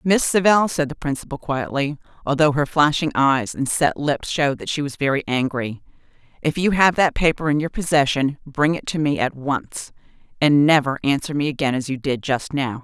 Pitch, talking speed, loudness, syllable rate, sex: 145 Hz, 200 wpm, -20 LUFS, 5.2 syllables/s, female